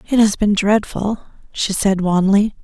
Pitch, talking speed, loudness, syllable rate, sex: 200 Hz, 160 wpm, -17 LUFS, 4.2 syllables/s, female